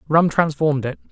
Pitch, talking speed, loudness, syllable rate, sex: 150 Hz, 160 wpm, -19 LUFS, 5.8 syllables/s, male